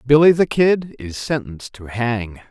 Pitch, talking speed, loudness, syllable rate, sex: 125 Hz, 170 wpm, -18 LUFS, 4.4 syllables/s, male